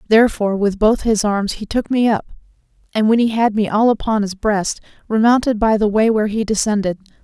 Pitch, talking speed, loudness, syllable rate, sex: 215 Hz, 205 wpm, -17 LUFS, 5.7 syllables/s, female